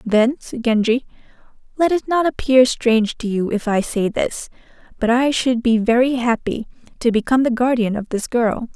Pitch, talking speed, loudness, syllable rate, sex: 240 Hz, 185 wpm, -18 LUFS, 5.0 syllables/s, female